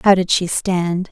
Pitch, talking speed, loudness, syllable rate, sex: 180 Hz, 215 wpm, -17 LUFS, 4.0 syllables/s, female